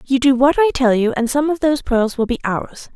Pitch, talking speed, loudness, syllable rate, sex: 260 Hz, 285 wpm, -17 LUFS, 5.7 syllables/s, female